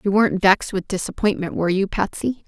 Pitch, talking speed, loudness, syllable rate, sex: 195 Hz, 195 wpm, -20 LUFS, 6.3 syllables/s, female